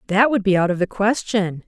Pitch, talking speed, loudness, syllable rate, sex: 200 Hz, 250 wpm, -19 LUFS, 5.4 syllables/s, female